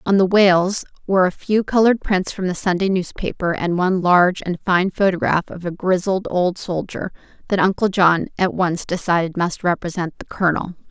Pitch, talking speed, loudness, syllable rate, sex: 185 Hz, 180 wpm, -19 LUFS, 5.3 syllables/s, female